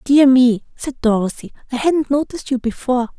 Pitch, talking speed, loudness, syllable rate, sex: 255 Hz, 170 wpm, -17 LUFS, 5.6 syllables/s, female